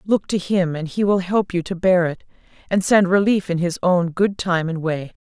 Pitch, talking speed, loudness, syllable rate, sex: 180 Hz, 240 wpm, -19 LUFS, 4.8 syllables/s, female